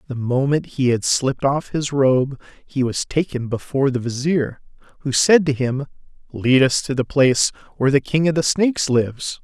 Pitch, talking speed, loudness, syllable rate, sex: 135 Hz, 190 wpm, -19 LUFS, 5.0 syllables/s, male